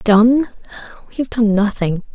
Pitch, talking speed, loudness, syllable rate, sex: 220 Hz, 110 wpm, -16 LUFS, 4.6 syllables/s, female